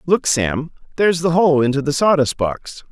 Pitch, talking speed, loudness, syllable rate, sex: 150 Hz, 185 wpm, -17 LUFS, 4.8 syllables/s, male